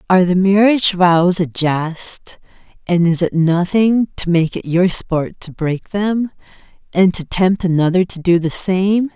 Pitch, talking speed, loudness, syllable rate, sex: 180 Hz, 170 wpm, -16 LUFS, 4.1 syllables/s, female